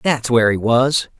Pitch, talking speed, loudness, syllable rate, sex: 125 Hz, 200 wpm, -16 LUFS, 4.9 syllables/s, male